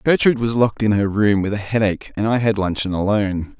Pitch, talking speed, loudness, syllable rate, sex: 105 Hz, 235 wpm, -19 LUFS, 6.4 syllables/s, male